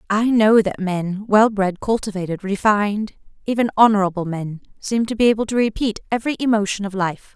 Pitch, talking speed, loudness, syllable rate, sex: 210 Hz, 155 wpm, -19 LUFS, 5.6 syllables/s, female